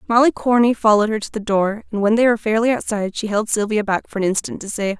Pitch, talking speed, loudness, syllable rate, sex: 215 Hz, 265 wpm, -18 LUFS, 6.9 syllables/s, female